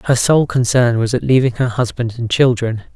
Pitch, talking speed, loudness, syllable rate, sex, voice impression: 120 Hz, 205 wpm, -15 LUFS, 5.3 syllables/s, male, masculine, adult-like, slightly relaxed, slightly bright, soft, raspy, intellectual, calm, friendly, slightly reassuring, slightly wild, lively, slightly kind